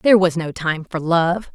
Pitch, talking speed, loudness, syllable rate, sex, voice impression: 175 Hz, 235 wpm, -19 LUFS, 4.6 syllables/s, female, very feminine, slightly adult-like, slightly thin, tensed, slightly powerful, bright, slightly soft, clear, fluent, cool, intellectual, very refreshing, sincere, calm, friendly, slightly reassuring, very unique, slightly elegant, wild, slightly sweet, very lively, kind, slightly intense, slightly sharp